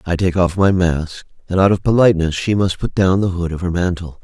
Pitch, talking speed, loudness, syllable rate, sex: 90 Hz, 255 wpm, -16 LUFS, 5.7 syllables/s, male